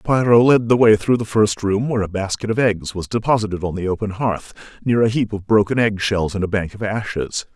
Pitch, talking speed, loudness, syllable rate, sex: 105 Hz, 245 wpm, -18 LUFS, 5.7 syllables/s, male